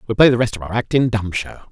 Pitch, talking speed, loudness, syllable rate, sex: 110 Hz, 350 wpm, -18 LUFS, 6.8 syllables/s, male